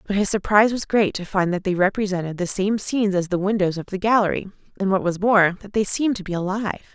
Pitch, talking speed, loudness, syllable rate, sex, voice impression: 195 Hz, 250 wpm, -21 LUFS, 6.5 syllables/s, female, feminine, adult-like, slightly sincere, slightly sweet